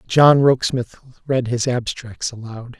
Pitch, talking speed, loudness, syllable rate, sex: 125 Hz, 130 wpm, -18 LUFS, 4.3 syllables/s, male